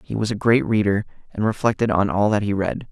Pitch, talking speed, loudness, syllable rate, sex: 105 Hz, 245 wpm, -20 LUFS, 5.9 syllables/s, male